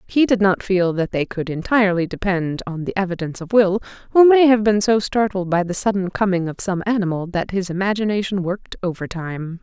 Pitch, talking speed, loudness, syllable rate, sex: 190 Hz, 200 wpm, -19 LUFS, 5.8 syllables/s, female